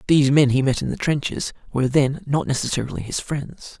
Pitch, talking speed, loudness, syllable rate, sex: 140 Hz, 205 wpm, -21 LUFS, 5.9 syllables/s, male